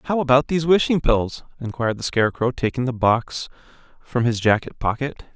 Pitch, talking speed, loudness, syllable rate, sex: 125 Hz, 170 wpm, -21 LUFS, 5.7 syllables/s, male